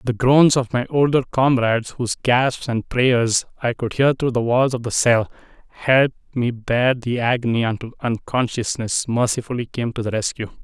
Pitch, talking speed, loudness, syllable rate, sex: 120 Hz, 175 wpm, -19 LUFS, 4.7 syllables/s, male